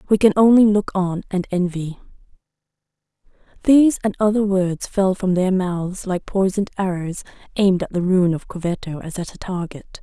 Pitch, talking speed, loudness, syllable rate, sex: 190 Hz, 170 wpm, -19 LUFS, 5.2 syllables/s, female